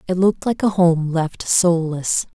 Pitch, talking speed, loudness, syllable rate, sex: 175 Hz, 175 wpm, -18 LUFS, 4.2 syllables/s, female